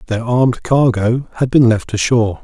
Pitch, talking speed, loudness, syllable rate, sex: 120 Hz, 175 wpm, -15 LUFS, 5.2 syllables/s, male